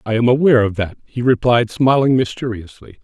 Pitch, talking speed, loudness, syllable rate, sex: 115 Hz, 160 wpm, -16 LUFS, 5.3 syllables/s, male